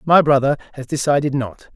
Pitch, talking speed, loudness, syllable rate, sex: 140 Hz, 170 wpm, -18 LUFS, 5.7 syllables/s, male